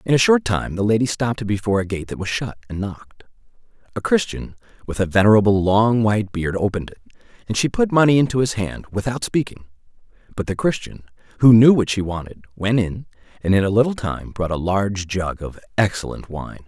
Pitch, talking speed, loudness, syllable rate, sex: 105 Hz, 200 wpm, -19 LUFS, 5.9 syllables/s, male